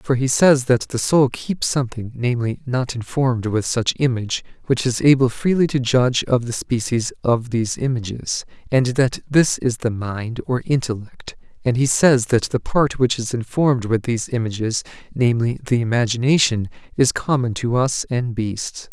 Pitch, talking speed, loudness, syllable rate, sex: 125 Hz, 160 wpm, -20 LUFS, 4.9 syllables/s, male